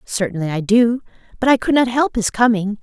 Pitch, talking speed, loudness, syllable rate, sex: 220 Hz, 190 wpm, -17 LUFS, 5.5 syllables/s, female